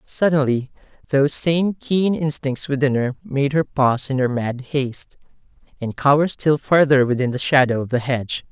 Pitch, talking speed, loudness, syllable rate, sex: 140 Hz, 170 wpm, -19 LUFS, 5.0 syllables/s, male